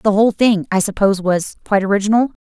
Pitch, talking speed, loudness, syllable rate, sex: 205 Hz, 195 wpm, -16 LUFS, 6.9 syllables/s, female